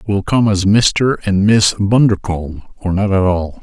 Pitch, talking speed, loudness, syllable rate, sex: 100 Hz, 180 wpm, -14 LUFS, 4.4 syllables/s, male